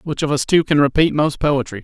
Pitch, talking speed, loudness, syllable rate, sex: 145 Hz, 260 wpm, -17 LUFS, 5.8 syllables/s, male